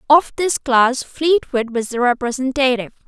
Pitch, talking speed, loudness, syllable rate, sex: 260 Hz, 135 wpm, -17 LUFS, 4.7 syllables/s, female